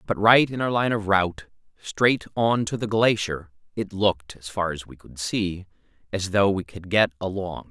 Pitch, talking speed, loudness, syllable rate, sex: 100 Hz, 200 wpm, -23 LUFS, 4.7 syllables/s, male